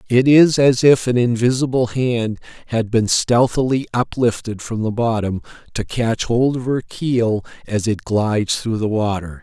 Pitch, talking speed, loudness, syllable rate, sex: 120 Hz, 165 wpm, -18 LUFS, 4.3 syllables/s, male